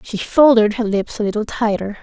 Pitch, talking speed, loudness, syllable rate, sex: 220 Hz, 210 wpm, -16 LUFS, 5.2 syllables/s, female